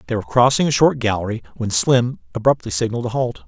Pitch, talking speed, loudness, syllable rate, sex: 120 Hz, 205 wpm, -18 LUFS, 6.7 syllables/s, male